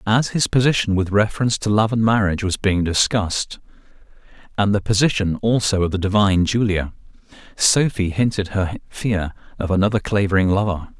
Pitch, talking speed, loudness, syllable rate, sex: 100 Hz, 155 wpm, -19 LUFS, 5.7 syllables/s, male